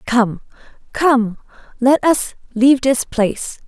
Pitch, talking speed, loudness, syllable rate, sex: 245 Hz, 115 wpm, -16 LUFS, 3.8 syllables/s, female